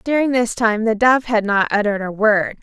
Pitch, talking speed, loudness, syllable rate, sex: 225 Hz, 230 wpm, -17 LUFS, 5.3 syllables/s, female